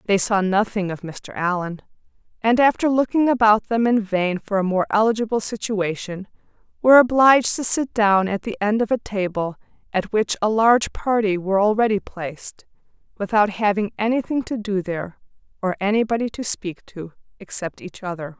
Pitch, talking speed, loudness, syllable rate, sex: 210 Hz, 165 wpm, -20 LUFS, 5.3 syllables/s, female